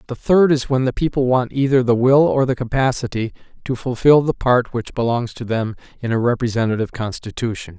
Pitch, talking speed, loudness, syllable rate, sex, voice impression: 125 Hz, 195 wpm, -18 LUFS, 5.7 syllables/s, male, very masculine, adult-like, middle-aged, thick, tensed, powerful, slightly bright, slightly soft, clear, fluent, cool, intellectual, very refreshing, very sincere, calm, friendly, reassuring, unique, elegant, slightly wild, sweet, slightly lively, kind, slightly modest, slightly light